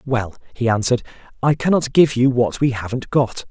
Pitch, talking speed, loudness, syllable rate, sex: 125 Hz, 190 wpm, -18 LUFS, 5.5 syllables/s, male